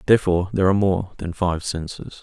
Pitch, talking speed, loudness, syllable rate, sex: 90 Hz, 190 wpm, -21 LUFS, 6.6 syllables/s, male